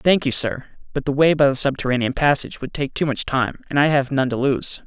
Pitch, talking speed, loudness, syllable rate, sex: 135 Hz, 260 wpm, -20 LUFS, 5.9 syllables/s, male